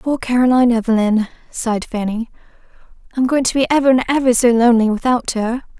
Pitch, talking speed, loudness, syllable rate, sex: 240 Hz, 165 wpm, -16 LUFS, 6.3 syllables/s, female